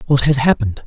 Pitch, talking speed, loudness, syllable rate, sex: 135 Hz, 210 wpm, -16 LUFS, 7.1 syllables/s, male